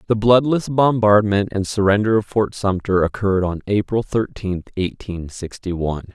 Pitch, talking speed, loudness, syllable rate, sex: 100 Hz, 145 wpm, -19 LUFS, 4.8 syllables/s, male